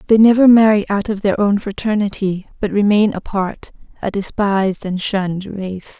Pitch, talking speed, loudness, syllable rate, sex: 200 Hz, 160 wpm, -16 LUFS, 4.9 syllables/s, female